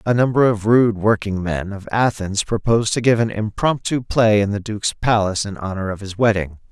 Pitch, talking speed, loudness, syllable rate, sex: 105 Hz, 195 wpm, -19 LUFS, 5.4 syllables/s, male